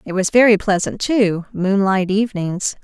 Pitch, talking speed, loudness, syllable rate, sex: 200 Hz, 150 wpm, -17 LUFS, 4.6 syllables/s, female